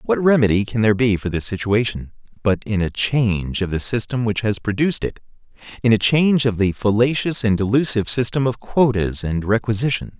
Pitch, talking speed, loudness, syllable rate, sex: 110 Hz, 190 wpm, -19 LUFS, 5.6 syllables/s, male